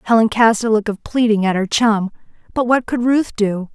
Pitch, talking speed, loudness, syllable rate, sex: 220 Hz, 225 wpm, -16 LUFS, 5.0 syllables/s, female